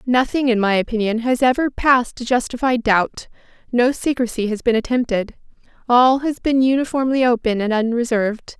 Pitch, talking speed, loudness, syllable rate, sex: 240 Hz, 155 wpm, -18 LUFS, 5.3 syllables/s, female